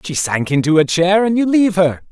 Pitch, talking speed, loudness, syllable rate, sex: 175 Hz, 255 wpm, -14 LUFS, 5.6 syllables/s, male